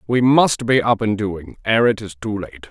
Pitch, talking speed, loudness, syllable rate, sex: 110 Hz, 245 wpm, -18 LUFS, 4.8 syllables/s, male